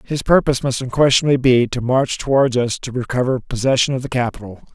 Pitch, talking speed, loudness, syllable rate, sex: 125 Hz, 190 wpm, -17 LUFS, 6.3 syllables/s, male